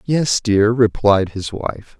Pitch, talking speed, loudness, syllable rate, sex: 110 Hz, 150 wpm, -17 LUFS, 3.2 syllables/s, male